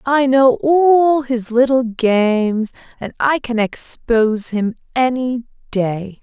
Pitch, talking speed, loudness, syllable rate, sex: 245 Hz, 125 wpm, -16 LUFS, 3.4 syllables/s, female